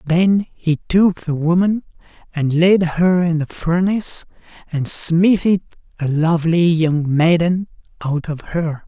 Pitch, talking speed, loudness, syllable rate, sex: 170 Hz, 135 wpm, -17 LUFS, 3.9 syllables/s, male